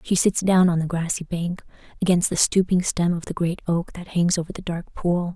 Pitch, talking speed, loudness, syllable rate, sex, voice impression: 175 Hz, 235 wpm, -22 LUFS, 5.2 syllables/s, female, feminine, adult-like, weak, very calm, slightly elegant, modest